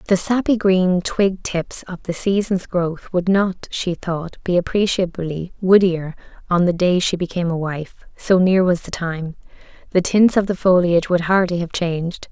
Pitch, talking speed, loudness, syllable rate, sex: 180 Hz, 180 wpm, -19 LUFS, 4.6 syllables/s, female